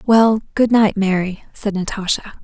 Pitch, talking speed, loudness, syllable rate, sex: 205 Hz, 150 wpm, -17 LUFS, 4.5 syllables/s, female